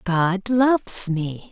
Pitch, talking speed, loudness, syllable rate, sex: 195 Hz, 120 wpm, -19 LUFS, 2.8 syllables/s, female